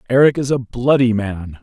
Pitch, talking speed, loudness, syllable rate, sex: 120 Hz, 185 wpm, -16 LUFS, 4.9 syllables/s, male